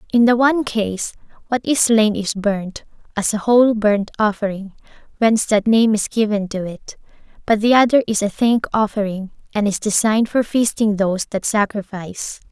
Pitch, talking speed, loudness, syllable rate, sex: 215 Hz, 175 wpm, -18 LUFS, 5.1 syllables/s, female